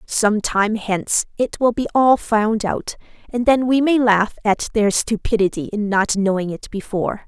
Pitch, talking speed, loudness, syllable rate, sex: 215 Hz, 180 wpm, -18 LUFS, 4.5 syllables/s, female